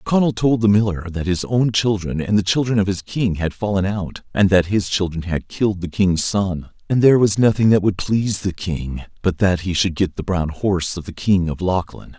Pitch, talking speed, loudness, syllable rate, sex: 95 Hz, 235 wpm, -19 LUFS, 5.2 syllables/s, male